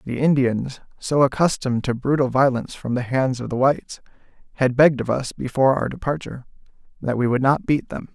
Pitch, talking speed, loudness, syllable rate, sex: 130 Hz, 190 wpm, -21 LUFS, 6.0 syllables/s, male